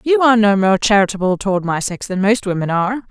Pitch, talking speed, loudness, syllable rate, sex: 205 Hz, 230 wpm, -16 LUFS, 6.4 syllables/s, female